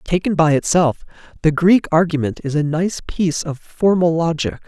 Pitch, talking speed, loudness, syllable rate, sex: 165 Hz, 165 wpm, -17 LUFS, 4.9 syllables/s, male